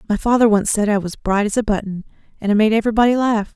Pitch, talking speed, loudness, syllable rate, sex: 215 Hz, 255 wpm, -17 LUFS, 6.6 syllables/s, female